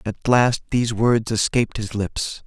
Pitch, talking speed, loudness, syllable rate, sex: 115 Hz, 170 wpm, -20 LUFS, 4.4 syllables/s, male